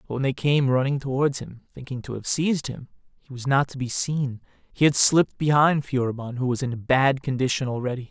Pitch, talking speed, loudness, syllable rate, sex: 135 Hz, 220 wpm, -23 LUFS, 5.7 syllables/s, male